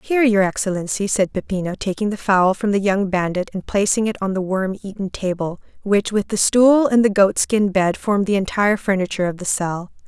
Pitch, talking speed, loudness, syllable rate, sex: 200 Hz, 215 wpm, -19 LUFS, 5.6 syllables/s, female